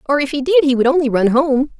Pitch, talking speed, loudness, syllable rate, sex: 270 Hz, 300 wpm, -15 LUFS, 6.4 syllables/s, female